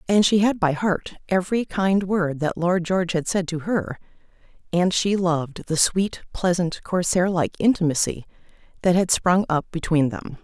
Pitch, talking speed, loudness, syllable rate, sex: 175 Hz, 165 wpm, -22 LUFS, 4.7 syllables/s, female